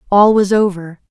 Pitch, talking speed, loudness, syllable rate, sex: 195 Hz, 165 wpm, -13 LUFS, 4.9 syllables/s, female